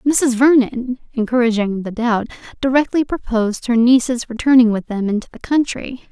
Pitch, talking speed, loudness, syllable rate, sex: 240 Hz, 145 wpm, -17 LUFS, 5.1 syllables/s, female